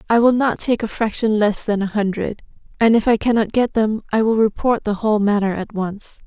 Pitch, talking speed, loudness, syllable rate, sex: 215 Hz, 230 wpm, -18 LUFS, 5.4 syllables/s, female